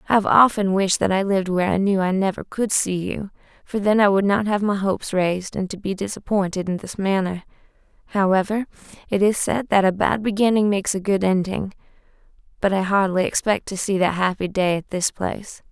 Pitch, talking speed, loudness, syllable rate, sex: 195 Hz, 210 wpm, -21 LUFS, 5.7 syllables/s, female